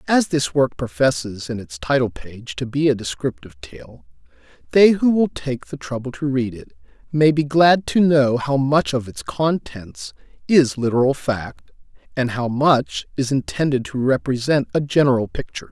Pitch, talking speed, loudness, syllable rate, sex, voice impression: 130 Hz, 170 wpm, -19 LUFS, 4.6 syllables/s, male, masculine, middle-aged, tensed, slightly powerful, clear, raspy, cool, intellectual, slightly mature, friendly, wild, lively, strict, slightly sharp